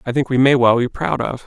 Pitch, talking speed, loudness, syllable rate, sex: 130 Hz, 325 wpm, -16 LUFS, 5.9 syllables/s, male